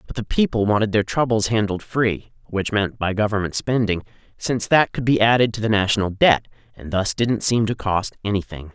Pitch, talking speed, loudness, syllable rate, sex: 105 Hz, 190 wpm, -20 LUFS, 5.4 syllables/s, male